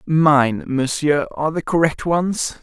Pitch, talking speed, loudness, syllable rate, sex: 150 Hz, 135 wpm, -18 LUFS, 3.7 syllables/s, male